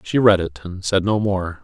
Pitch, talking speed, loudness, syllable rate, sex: 95 Hz, 255 wpm, -19 LUFS, 4.7 syllables/s, male